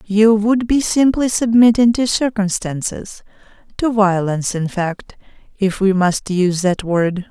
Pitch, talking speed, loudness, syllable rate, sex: 205 Hz, 140 wpm, -16 LUFS, 4.2 syllables/s, female